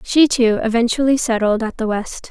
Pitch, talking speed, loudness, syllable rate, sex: 235 Hz, 180 wpm, -17 LUFS, 5.1 syllables/s, female